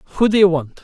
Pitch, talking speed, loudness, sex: 180 Hz, 285 wpm, -15 LUFS, male